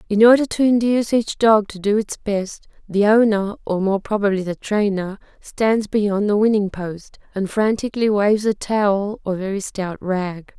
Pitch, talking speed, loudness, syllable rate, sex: 205 Hz, 175 wpm, -19 LUFS, 4.7 syllables/s, female